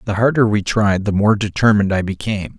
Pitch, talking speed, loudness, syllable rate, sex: 105 Hz, 210 wpm, -16 LUFS, 6.1 syllables/s, male